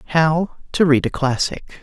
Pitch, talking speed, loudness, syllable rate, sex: 150 Hz, 165 wpm, -19 LUFS, 4.7 syllables/s, male